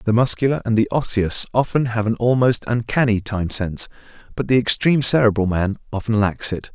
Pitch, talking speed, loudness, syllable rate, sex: 115 Hz, 180 wpm, -19 LUFS, 5.7 syllables/s, male